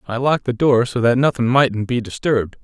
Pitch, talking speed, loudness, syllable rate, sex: 120 Hz, 230 wpm, -17 LUFS, 5.7 syllables/s, male